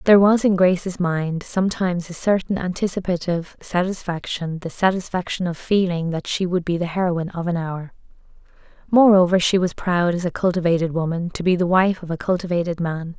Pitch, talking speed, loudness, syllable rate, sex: 175 Hz, 180 wpm, -21 LUFS, 5.7 syllables/s, female